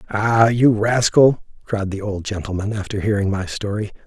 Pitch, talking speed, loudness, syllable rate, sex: 105 Hz, 160 wpm, -19 LUFS, 4.8 syllables/s, male